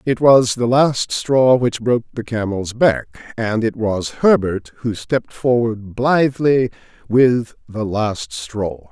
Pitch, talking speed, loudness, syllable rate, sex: 115 Hz, 150 wpm, -17 LUFS, 3.6 syllables/s, male